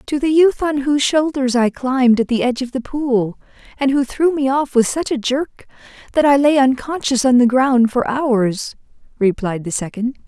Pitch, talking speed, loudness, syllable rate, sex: 260 Hz, 205 wpm, -17 LUFS, 4.8 syllables/s, female